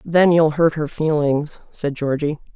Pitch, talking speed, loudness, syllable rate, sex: 155 Hz, 165 wpm, -19 LUFS, 4.1 syllables/s, female